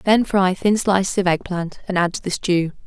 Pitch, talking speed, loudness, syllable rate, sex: 185 Hz, 250 wpm, -20 LUFS, 5.0 syllables/s, female